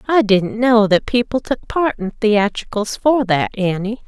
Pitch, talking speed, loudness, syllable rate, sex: 220 Hz, 175 wpm, -17 LUFS, 4.2 syllables/s, female